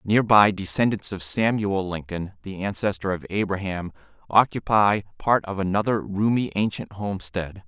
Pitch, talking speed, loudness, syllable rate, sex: 100 Hz, 135 wpm, -23 LUFS, 4.8 syllables/s, male